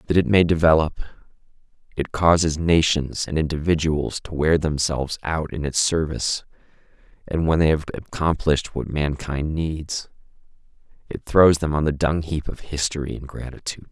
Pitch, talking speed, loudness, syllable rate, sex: 80 Hz, 150 wpm, -22 LUFS, 4.9 syllables/s, male